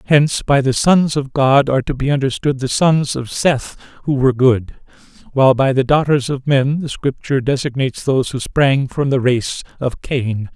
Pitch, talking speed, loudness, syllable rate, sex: 135 Hz, 195 wpm, -16 LUFS, 5.0 syllables/s, male